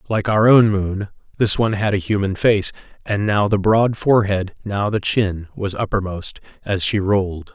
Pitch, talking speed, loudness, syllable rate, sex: 100 Hz, 185 wpm, -18 LUFS, 4.7 syllables/s, male